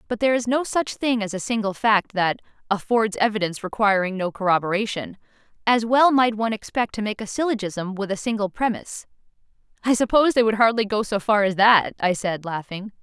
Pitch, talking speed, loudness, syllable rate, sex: 215 Hz, 195 wpm, -22 LUFS, 5.8 syllables/s, female